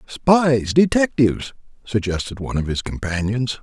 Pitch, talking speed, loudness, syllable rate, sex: 125 Hz, 100 wpm, -19 LUFS, 4.8 syllables/s, male